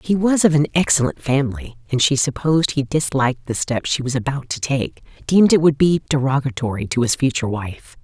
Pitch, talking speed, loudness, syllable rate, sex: 135 Hz, 195 wpm, -18 LUFS, 5.8 syllables/s, female